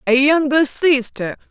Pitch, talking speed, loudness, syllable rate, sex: 280 Hz, 120 wpm, -16 LUFS, 4.0 syllables/s, female